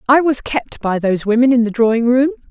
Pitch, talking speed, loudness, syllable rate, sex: 245 Hz, 240 wpm, -15 LUFS, 6.0 syllables/s, female